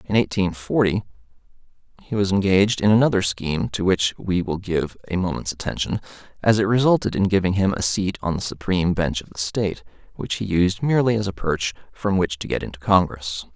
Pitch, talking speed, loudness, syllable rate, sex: 95 Hz, 200 wpm, -22 LUFS, 5.8 syllables/s, male